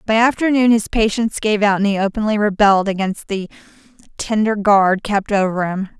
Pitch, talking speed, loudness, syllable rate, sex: 205 Hz, 170 wpm, -17 LUFS, 5.5 syllables/s, female